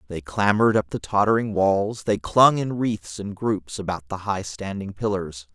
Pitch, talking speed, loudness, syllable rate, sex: 100 Hz, 185 wpm, -23 LUFS, 4.6 syllables/s, male